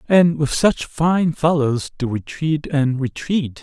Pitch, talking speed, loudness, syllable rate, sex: 150 Hz, 150 wpm, -19 LUFS, 3.5 syllables/s, male